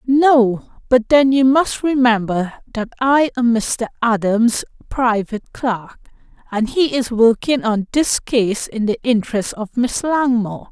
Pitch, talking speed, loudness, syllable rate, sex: 235 Hz, 145 wpm, -17 LUFS, 3.9 syllables/s, female